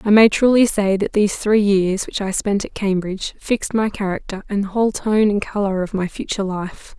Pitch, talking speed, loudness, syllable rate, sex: 200 Hz, 225 wpm, -19 LUFS, 5.4 syllables/s, female